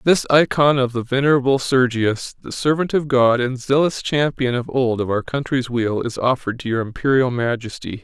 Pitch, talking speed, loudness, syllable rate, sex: 130 Hz, 185 wpm, -19 LUFS, 5.1 syllables/s, male